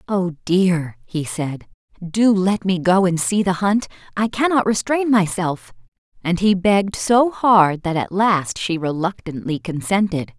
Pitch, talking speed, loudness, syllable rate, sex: 185 Hz, 155 wpm, -19 LUFS, 4.0 syllables/s, female